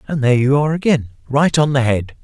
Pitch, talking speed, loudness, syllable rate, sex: 135 Hz, 240 wpm, -16 LUFS, 6.5 syllables/s, male